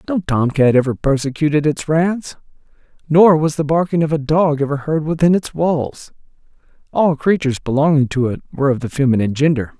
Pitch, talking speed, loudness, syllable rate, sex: 150 Hz, 180 wpm, -16 LUFS, 5.7 syllables/s, male